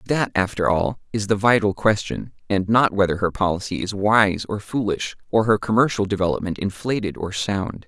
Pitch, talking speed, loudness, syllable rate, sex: 100 Hz, 175 wpm, -21 LUFS, 5.1 syllables/s, male